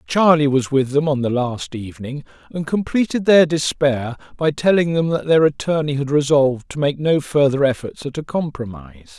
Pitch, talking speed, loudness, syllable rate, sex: 140 Hz, 185 wpm, -18 LUFS, 5.2 syllables/s, male